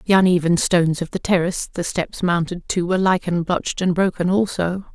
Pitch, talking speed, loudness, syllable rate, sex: 180 Hz, 195 wpm, -20 LUFS, 5.8 syllables/s, female